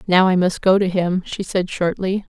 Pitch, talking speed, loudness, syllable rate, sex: 185 Hz, 230 wpm, -19 LUFS, 4.7 syllables/s, female